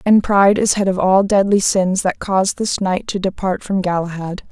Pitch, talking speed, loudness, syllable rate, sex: 190 Hz, 215 wpm, -16 LUFS, 5.1 syllables/s, female